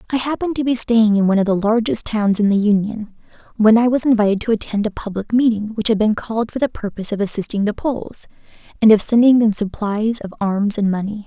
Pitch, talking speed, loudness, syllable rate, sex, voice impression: 215 Hz, 230 wpm, -17 LUFS, 6.2 syllables/s, female, very feminine, young, slightly soft, cute, slightly refreshing, friendly